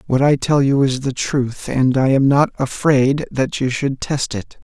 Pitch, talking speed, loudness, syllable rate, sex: 135 Hz, 215 wpm, -17 LUFS, 4.2 syllables/s, male